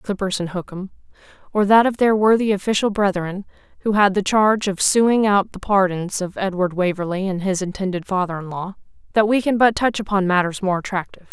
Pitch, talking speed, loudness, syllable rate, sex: 195 Hz, 195 wpm, -19 LUFS, 5.8 syllables/s, female